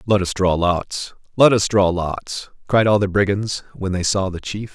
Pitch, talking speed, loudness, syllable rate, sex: 100 Hz, 215 wpm, -19 LUFS, 4.3 syllables/s, male